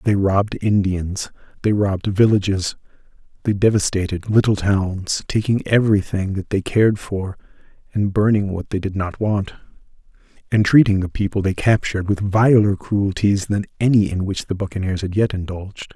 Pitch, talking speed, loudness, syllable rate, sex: 100 Hz, 155 wpm, -19 LUFS, 5.1 syllables/s, male